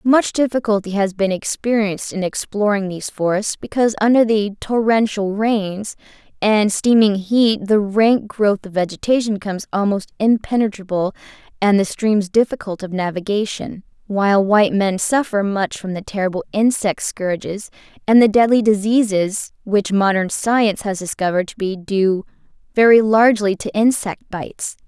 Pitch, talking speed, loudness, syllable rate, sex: 205 Hz, 140 wpm, -18 LUFS, 5.0 syllables/s, female